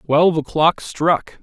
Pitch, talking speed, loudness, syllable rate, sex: 160 Hz, 125 wpm, -17 LUFS, 3.6 syllables/s, male